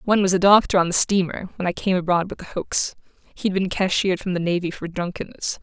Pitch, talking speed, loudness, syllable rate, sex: 185 Hz, 235 wpm, -21 LUFS, 6.2 syllables/s, female